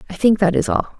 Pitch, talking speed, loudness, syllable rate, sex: 195 Hz, 300 wpm, -17 LUFS, 6.4 syllables/s, female